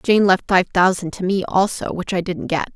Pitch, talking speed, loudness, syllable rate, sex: 190 Hz, 240 wpm, -19 LUFS, 5.1 syllables/s, female